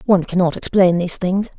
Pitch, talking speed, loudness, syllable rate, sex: 180 Hz, 190 wpm, -17 LUFS, 6.5 syllables/s, female